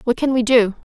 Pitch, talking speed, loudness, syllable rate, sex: 240 Hz, 265 wpm, -16 LUFS, 6.1 syllables/s, female